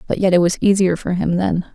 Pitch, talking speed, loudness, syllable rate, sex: 180 Hz, 275 wpm, -17 LUFS, 5.9 syllables/s, female